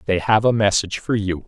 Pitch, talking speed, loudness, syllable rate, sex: 100 Hz, 245 wpm, -19 LUFS, 6.1 syllables/s, male